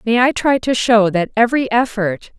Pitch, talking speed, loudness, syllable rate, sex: 230 Hz, 200 wpm, -15 LUFS, 5.1 syllables/s, female